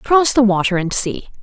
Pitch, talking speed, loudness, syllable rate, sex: 220 Hz, 210 wpm, -16 LUFS, 5.0 syllables/s, female